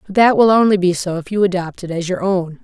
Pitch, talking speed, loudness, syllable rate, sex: 185 Hz, 295 wpm, -16 LUFS, 6.1 syllables/s, female